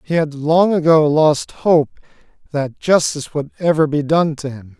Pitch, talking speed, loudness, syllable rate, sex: 155 Hz, 175 wpm, -16 LUFS, 4.5 syllables/s, male